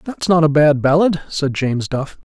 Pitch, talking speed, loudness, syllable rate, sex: 155 Hz, 200 wpm, -16 LUFS, 5.0 syllables/s, male